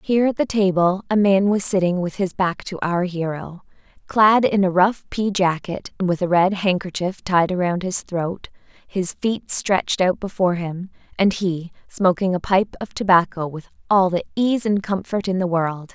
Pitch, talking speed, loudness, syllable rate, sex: 185 Hz, 190 wpm, -20 LUFS, 4.7 syllables/s, female